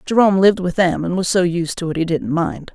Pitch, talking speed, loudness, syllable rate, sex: 175 Hz, 285 wpm, -17 LUFS, 6.0 syllables/s, female